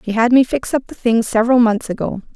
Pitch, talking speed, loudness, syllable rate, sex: 230 Hz, 255 wpm, -16 LUFS, 6.1 syllables/s, female